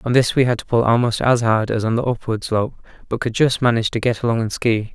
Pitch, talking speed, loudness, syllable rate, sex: 115 Hz, 280 wpm, -19 LUFS, 6.4 syllables/s, male